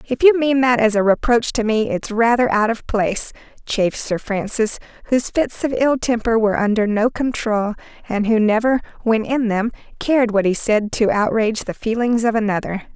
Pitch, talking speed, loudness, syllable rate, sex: 225 Hz, 195 wpm, -18 LUFS, 5.3 syllables/s, female